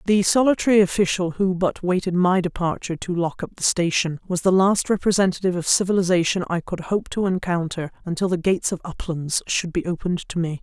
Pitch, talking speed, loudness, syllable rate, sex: 180 Hz, 190 wpm, -21 LUFS, 6.0 syllables/s, female